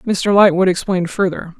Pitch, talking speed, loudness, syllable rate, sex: 185 Hz, 150 wpm, -15 LUFS, 5.3 syllables/s, female